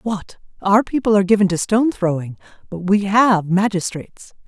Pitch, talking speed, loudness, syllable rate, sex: 200 Hz, 160 wpm, -17 LUFS, 5.5 syllables/s, female